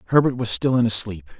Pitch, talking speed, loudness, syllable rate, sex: 115 Hz, 260 wpm, -21 LUFS, 6.5 syllables/s, male